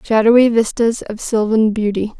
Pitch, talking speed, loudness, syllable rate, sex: 220 Hz, 135 wpm, -15 LUFS, 5.0 syllables/s, female